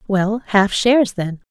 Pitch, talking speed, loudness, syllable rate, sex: 205 Hz, 160 wpm, -17 LUFS, 4.3 syllables/s, female